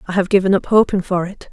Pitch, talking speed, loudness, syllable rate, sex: 190 Hz, 275 wpm, -16 LUFS, 6.7 syllables/s, female